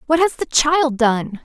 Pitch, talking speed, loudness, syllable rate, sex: 270 Hz, 210 wpm, -17 LUFS, 3.9 syllables/s, female